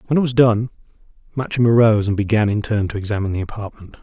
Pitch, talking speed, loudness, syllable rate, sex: 110 Hz, 210 wpm, -18 LUFS, 7.3 syllables/s, male